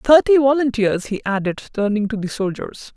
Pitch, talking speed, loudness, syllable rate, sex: 230 Hz, 160 wpm, -18 LUFS, 5.2 syllables/s, female